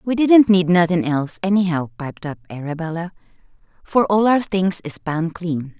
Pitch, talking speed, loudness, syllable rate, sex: 180 Hz, 165 wpm, -18 LUFS, 4.9 syllables/s, female